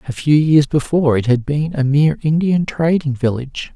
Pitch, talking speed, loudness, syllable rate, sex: 145 Hz, 190 wpm, -16 LUFS, 5.4 syllables/s, male